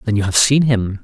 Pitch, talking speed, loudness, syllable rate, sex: 110 Hz, 290 wpm, -15 LUFS, 5.6 syllables/s, male